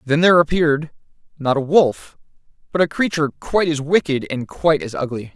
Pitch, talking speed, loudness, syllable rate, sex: 150 Hz, 180 wpm, -18 LUFS, 6.0 syllables/s, male